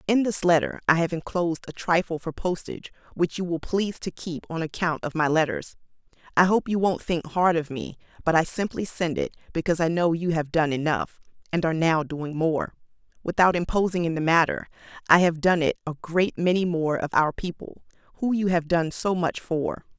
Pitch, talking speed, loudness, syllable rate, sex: 170 Hz, 205 wpm, -24 LUFS, 5.4 syllables/s, female